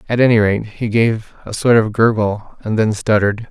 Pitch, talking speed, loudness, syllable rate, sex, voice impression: 110 Hz, 205 wpm, -16 LUFS, 5.1 syllables/s, male, masculine, adult-like, slightly dark, sincere, calm, slightly sweet